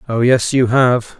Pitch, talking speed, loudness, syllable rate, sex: 125 Hz, 200 wpm, -14 LUFS, 4.0 syllables/s, male